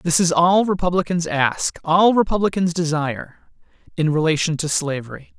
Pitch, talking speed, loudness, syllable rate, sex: 165 Hz, 110 wpm, -19 LUFS, 5.0 syllables/s, male